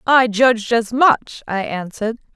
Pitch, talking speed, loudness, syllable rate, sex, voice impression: 230 Hz, 155 wpm, -17 LUFS, 4.4 syllables/s, female, very feminine, young, very thin, very tensed, powerful, very bright, hard, very clear, very fluent, slightly raspy, very cute, intellectual, very refreshing, sincere, slightly calm, friendly, slightly reassuring, very unique, elegant, slightly wild, slightly sweet, lively, strict, slightly intense, sharp